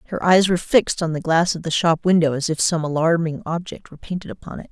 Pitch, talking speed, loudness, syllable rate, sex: 165 Hz, 255 wpm, -19 LUFS, 6.6 syllables/s, female